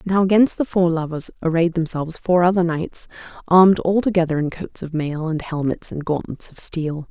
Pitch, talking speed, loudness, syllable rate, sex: 170 Hz, 185 wpm, -20 LUFS, 5.2 syllables/s, female